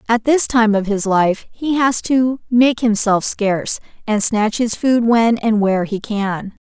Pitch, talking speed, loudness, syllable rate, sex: 225 Hz, 190 wpm, -16 LUFS, 4.0 syllables/s, female